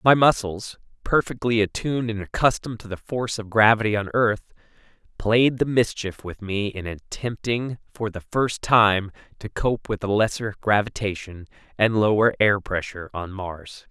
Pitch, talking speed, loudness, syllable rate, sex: 105 Hz, 155 wpm, -23 LUFS, 4.7 syllables/s, male